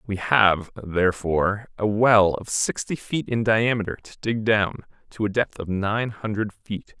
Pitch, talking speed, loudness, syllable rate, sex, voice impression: 105 Hz, 170 wpm, -23 LUFS, 4.2 syllables/s, male, masculine, adult-like, thick, tensed, powerful, slightly hard, clear, fluent, cool, intellectual, slightly friendly, reassuring, wild, lively